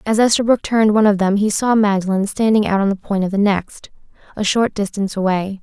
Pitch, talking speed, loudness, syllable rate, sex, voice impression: 205 Hz, 225 wpm, -17 LUFS, 6.1 syllables/s, female, very feminine, young, thin, slightly tensed, powerful, slightly dark, soft, slightly clear, fluent, slightly raspy, very cute, intellectual, refreshing, sincere, very calm, very friendly, very reassuring, unique, elegant, slightly wild, sweet, slightly lively, very kind, modest, light